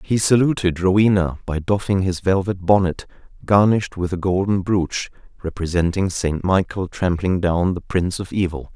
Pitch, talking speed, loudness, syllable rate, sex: 95 Hz, 150 wpm, -19 LUFS, 4.9 syllables/s, male